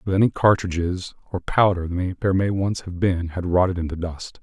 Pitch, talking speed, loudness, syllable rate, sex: 90 Hz, 190 wpm, -22 LUFS, 5.1 syllables/s, male